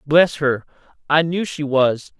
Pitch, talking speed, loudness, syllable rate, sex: 150 Hz, 165 wpm, -19 LUFS, 3.7 syllables/s, male